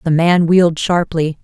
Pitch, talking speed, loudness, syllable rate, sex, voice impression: 165 Hz, 165 wpm, -14 LUFS, 4.6 syllables/s, female, feminine, middle-aged, tensed, powerful, bright, clear, fluent, intellectual, calm, slightly friendly, elegant, lively, slightly strict, slightly sharp